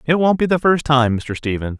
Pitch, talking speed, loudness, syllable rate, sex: 140 Hz, 265 wpm, -17 LUFS, 5.3 syllables/s, male